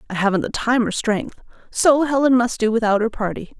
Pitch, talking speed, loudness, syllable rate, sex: 230 Hz, 215 wpm, -19 LUFS, 5.5 syllables/s, female